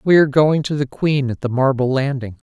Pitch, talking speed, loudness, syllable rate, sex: 140 Hz, 240 wpm, -18 LUFS, 5.6 syllables/s, male